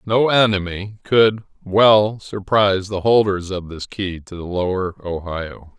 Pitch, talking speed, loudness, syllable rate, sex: 100 Hz, 145 wpm, -18 LUFS, 4.0 syllables/s, male